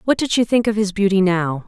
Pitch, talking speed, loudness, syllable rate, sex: 200 Hz, 285 wpm, -18 LUFS, 5.8 syllables/s, female